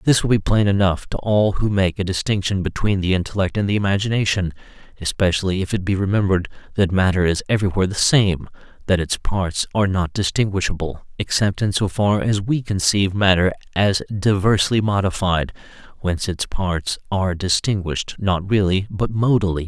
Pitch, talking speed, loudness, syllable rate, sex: 95 Hz, 165 wpm, -20 LUFS, 5.6 syllables/s, male